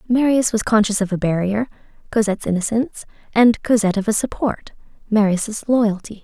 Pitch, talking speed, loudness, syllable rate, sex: 215 Hz, 145 wpm, -19 LUFS, 5.6 syllables/s, female